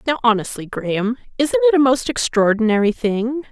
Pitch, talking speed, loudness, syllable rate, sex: 230 Hz, 155 wpm, -18 LUFS, 5.4 syllables/s, female